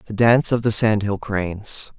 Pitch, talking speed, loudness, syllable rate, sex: 110 Hz, 210 wpm, -19 LUFS, 5.1 syllables/s, male